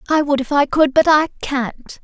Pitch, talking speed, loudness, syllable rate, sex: 285 Hz, 235 wpm, -16 LUFS, 4.4 syllables/s, female